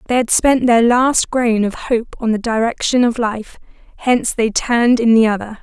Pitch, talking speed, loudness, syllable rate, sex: 230 Hz, 205 wpm, -15 LUFS, 4.8 syllables/s, female